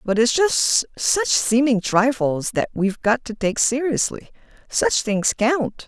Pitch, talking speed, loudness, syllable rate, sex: 240 Hz, 155 wpm, -20 LUFS, 3.9 syllables/s, female